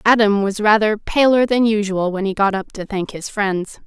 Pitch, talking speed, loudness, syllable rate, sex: 205 Hz, 215 wpm, -17 LUFS, 4.8 syllables/s, female